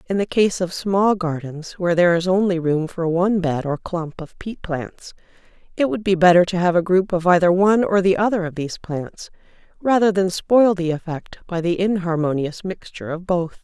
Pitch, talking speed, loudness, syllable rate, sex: 180 Hz, 205 wpm, -19 LUFS, 5.2 syllables/s, female